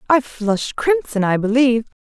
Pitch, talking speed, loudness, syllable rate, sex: 245 Hz, 150 wpm, -18 LUFS, 5.2 syllables/s, female